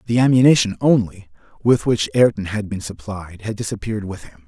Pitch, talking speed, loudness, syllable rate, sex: 105 Hz, 175 wpm, -18 LUFS, 5.7 syllables/s, male